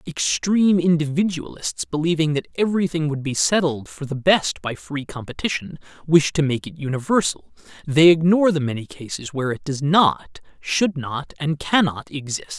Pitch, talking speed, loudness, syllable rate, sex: 155 Hz, 155 wpm, -21 LUFS, 5.0 syllables/s, male